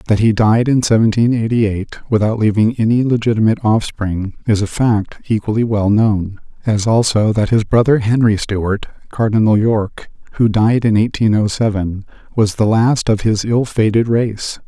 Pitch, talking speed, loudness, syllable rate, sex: 110 Hz, 170 wpm, -15 LUFS, 4.8 syllables/s, male